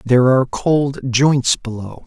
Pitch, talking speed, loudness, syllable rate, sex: 130 Hz, 145 wpm, -16 LUFS, 4.1 syllables/s, male